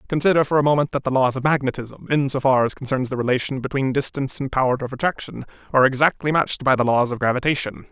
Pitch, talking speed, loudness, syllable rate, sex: 135 Hz, 210 wpm, -20 LUFS, 7.0 syllables/s, male